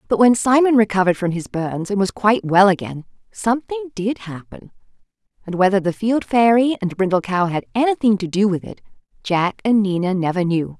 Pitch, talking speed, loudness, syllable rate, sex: 205 Hz, 190 wpm, -18 LUFS, 5.6 syllables/s, female